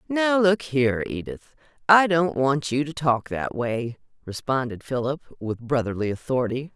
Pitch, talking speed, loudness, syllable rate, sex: 140 Hz, 150 wpm, -23 LUFS, 4.6 syllables/s, female